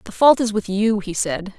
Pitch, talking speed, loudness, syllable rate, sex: 210 Hz, 265 wpm, -19 LUFS, 4.9 syllables/s, female